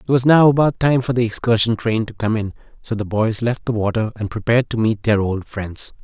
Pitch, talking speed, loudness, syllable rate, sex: 115 Hz, 250 wpm, -18 LUFS, 5.6 syllables/s, male